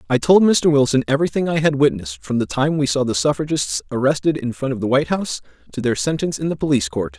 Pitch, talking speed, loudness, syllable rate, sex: 145 Hz, 240 wpm, -19 LUFS, 6.8 syllables/s, male